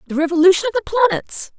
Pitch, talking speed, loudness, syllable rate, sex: 360 Hz, 190 wpm, -16 LUFS, 8.7 syllables/s, female